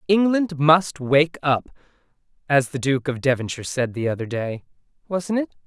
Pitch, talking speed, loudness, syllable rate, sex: 150 Hz, 160 wpm, -21 LUFS, 4.9 syllables/s, male